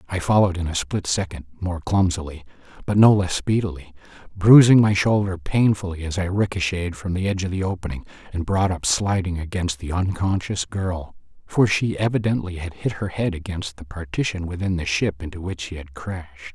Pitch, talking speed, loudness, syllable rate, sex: 90 Hz, 185 wpm, -22 LUFS, 5.6 syllables/s, male